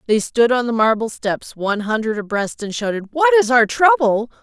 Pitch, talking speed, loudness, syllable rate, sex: 215 Hz, 205 wpm, -17 LUFS, 5.2 syllables/s, female